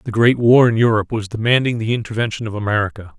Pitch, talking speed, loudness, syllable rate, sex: 110 Hz, 205 wpm, -17 LUFS, 6.9 syllables/s, male